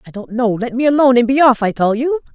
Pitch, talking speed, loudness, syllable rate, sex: 250 Hz, 305 wpm, -14 LUFS, 6.8 syllables/s, female